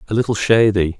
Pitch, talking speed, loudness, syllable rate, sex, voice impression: 105 Hz, 180 wpm, -16 LUFS, 6.2 syllables/s, male, masculine, adult-like, thick, cool, slightly intellectual, slightly calm, slightly wild